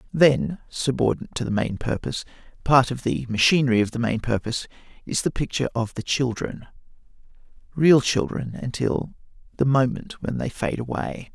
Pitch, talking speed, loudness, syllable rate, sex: 125 Hz, 150 wpm, -23 LUFS, 5.5 syllables/s, male